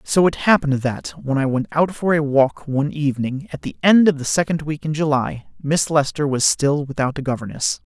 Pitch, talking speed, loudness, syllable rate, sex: 145 Hz, 220 wpm, -19 LUFS, 5.4 syllables/s, male